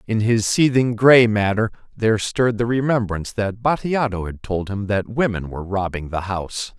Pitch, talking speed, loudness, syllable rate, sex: 110 Hz, 175 wpm, -20 LUFS, 5.2 syllables/s, male